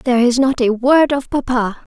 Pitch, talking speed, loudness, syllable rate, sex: 250 Hz, 215 wpm, -15 LUFS, 4.9 syllables/s, female